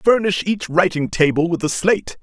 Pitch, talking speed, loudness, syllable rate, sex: 175 Hz, 190 wpm, -18 LUFS, 5.2 syllables/s, male